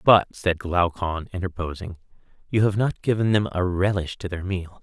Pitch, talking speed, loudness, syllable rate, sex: 95 Hz, 175 wpm, -24 LUFS, 4.9 syllables/s, male